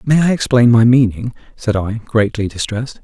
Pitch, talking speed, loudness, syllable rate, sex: 115 Hz, 180 wpm, -15 LUFS, 5.1 syllables/s, male